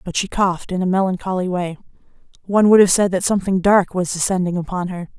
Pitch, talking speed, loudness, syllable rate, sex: 185 Hz, 210 wpm, -18 LUFS, 6.5 syllables/s, female